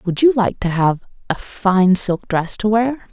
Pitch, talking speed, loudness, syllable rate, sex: 205 Hz, 210 wpm, -17 LUFS, 4.0 syllables/s, female